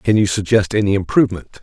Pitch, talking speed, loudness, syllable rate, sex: 100 Hz, 185 wpm, -16 LUFS, 6.3 syllables/s, male